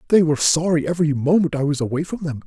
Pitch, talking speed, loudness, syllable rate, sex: 155 Hz, 245 wpm, -19 LUFS, 7.2 syllables/s, male